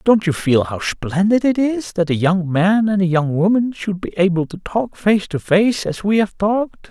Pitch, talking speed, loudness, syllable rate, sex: 190 Hz, 235 wpm, -17 LUFS, 4.6 syllables/s, male